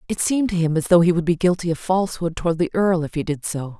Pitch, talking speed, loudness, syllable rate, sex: 170 Hz, 300 wpm, -20 LUFS, 6.7 syllables/s, female